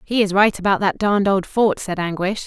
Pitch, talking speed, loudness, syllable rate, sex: 195 Hz, 245 wpm, -18 LUFS, 5.6 syllables/s, female